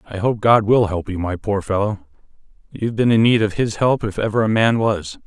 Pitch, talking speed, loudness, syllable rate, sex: 105 Hz, 230 wpm, -18 LUFS, 5.2 syllables/s, male